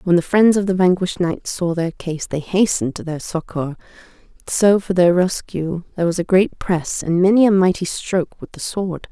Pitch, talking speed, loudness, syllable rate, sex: 180 Hz, 210 wpm, -18 LUFS, 5.1 syllables/s, female